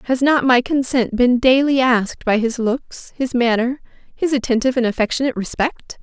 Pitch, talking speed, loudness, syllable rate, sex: 250 Hz, 170 wpm, -17 LUFS, 5.3 syllables/s, female